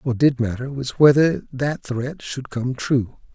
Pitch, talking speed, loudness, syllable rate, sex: 130 Hz, 180 wpm, -21 LUFS, 3.8 syllables/s, male